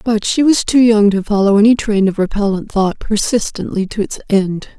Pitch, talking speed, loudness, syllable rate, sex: 210 Hz, 200 wpm, -14 LUFS, 5.1 syllables/s, female